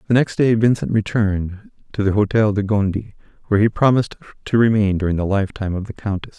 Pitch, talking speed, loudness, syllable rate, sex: 105 Hz, 195 wpm, -19 LUFS, 6.5 syllables/s, male